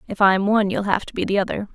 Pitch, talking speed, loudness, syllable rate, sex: 200 Hz, 310 wpm, -20 LUFS, 7.2 syllables/s, female